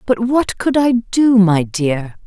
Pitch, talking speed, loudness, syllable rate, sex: 215 Hz, 185 wpm, -15 LUFS, 3.4 syllables/s, female